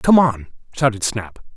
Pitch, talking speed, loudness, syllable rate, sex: 125 Hz, 155 wpm, -19 LUFS, 4.3 syllables/s, male